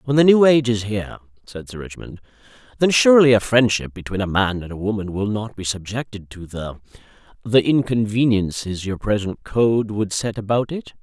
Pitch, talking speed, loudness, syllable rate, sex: 110 Hz, 180 wpm, -19 LUFS, 5.4 syllables/s, male